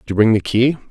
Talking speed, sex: 330 wpm, male